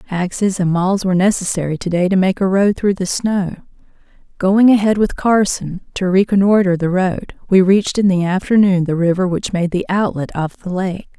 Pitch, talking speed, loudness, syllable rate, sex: 190 Hz, 190 wpm, -16 LUFS, 5.2 syllables/s, female